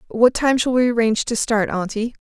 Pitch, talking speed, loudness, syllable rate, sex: 230 Hz, 215 wpm, -18 LUFS, 5.6 syllables/s, female